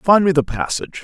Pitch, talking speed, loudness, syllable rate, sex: 185 Hz, 235 wpm, -17 LUFS, 6.1 syllables/s, male